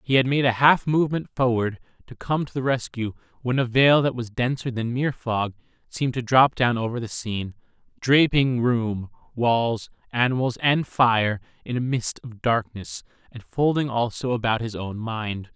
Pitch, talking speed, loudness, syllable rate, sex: 120 Hz, 175 wpm, -23 LUFS, 4.8 syllables/s, male